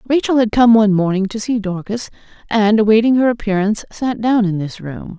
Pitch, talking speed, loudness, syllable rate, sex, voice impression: 215 Hz, 195 wpm, -15 LUFS, 5.7 syllables/s, female, feminine, slightly middle-aged, slightly powerful, slightly hard, slightly raspy, intellectual, calm, reassuring, elegant, slightly strict, slightly sharp, modest